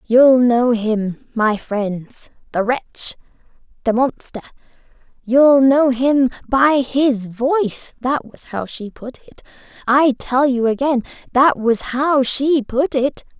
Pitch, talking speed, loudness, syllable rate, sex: 250 Hz, 130 wpm, -17 LUFS, 3.3 syllables/s, female